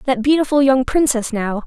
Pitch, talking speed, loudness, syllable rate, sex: 255 Hz, 180 wpm, -16 LUFS, 5.0 syllables/s, female